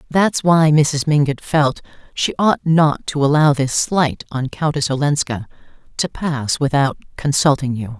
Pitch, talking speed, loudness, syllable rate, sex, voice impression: 145 Hz, 150 wpm, -17 LUFS, 4.2 syllables/s, female, feminine, middle-aged, tensed, slightly hard, clear, fluent, intellectual, slightly calm, unique, elegant, slightly strict, slightly sharp